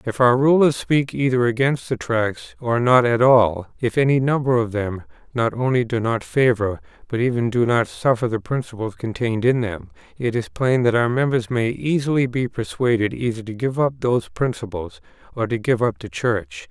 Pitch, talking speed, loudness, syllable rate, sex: 120 Hz, 195 wpm, -20 LUFS, 5.0 syllables/s, male